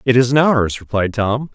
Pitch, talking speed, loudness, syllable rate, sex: 120 Hz, 195 wpm, -16 LUFS, 4.3 syllables/s, male